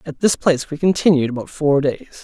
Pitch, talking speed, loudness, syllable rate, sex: 155 Hz, 215 wpm, -18 LUFS, 6.1 syllables/s, male